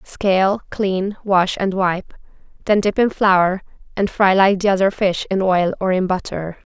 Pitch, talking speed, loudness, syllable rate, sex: 190 Hz, 180 wpm, -18 LUFS, 4.2 syllables/s, female